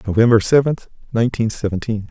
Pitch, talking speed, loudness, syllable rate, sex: 115 Hz, 115 wpm, -17 LUFS, 6.4 syllables/s, male